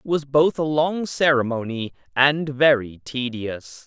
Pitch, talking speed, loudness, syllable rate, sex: 135 Hz, 140 wpm, -21 LUFS, 3.9 syllables/s, male